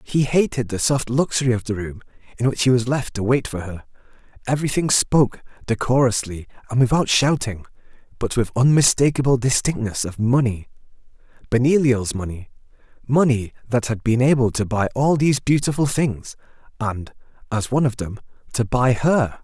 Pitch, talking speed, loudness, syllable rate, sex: 125 Hz, 155 wpm, -20 LUFS, 5.4 syllables/s, male